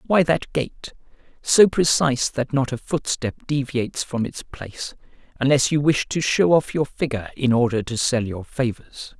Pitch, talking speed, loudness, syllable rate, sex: 135 Hz, 175 wpm, -21 LUFS, 4.8 syllables/s, male